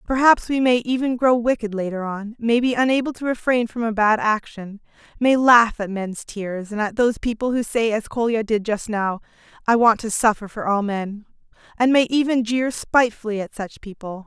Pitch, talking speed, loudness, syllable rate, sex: 225 Hz, 200 wpm, -20 LUFS, 5.1 syllables/s, female